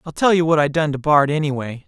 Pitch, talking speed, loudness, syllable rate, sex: 150 Hz, 290 wpm, -18 LUFS, 6.2 syllables/s, male